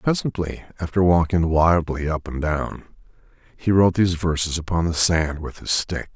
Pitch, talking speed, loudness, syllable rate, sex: 85 Hz, 165 wpm, -21 LUFS, 5.0 syllables/s, male